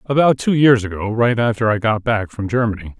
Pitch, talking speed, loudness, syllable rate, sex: 115 Hz, 220 wpm, -17 LUFS, 5.6 syllables/s, male